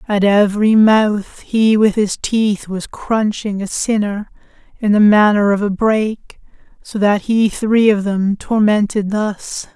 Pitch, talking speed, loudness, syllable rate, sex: 210 Hz, 155 wpm, -15 LUFS, 3.8 syllables/s, female